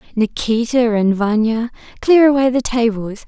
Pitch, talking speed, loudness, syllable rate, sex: 235 Hz, 110 wpm, -16 LUFS, 4.6 syllables/s, female